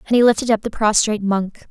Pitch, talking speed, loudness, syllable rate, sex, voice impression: 215 Hz, 245 wpm, -17 LUFS, 6.5 syllables/s, female, feminine, slightly adult-like, clear, slightly cute, refreshing, friendly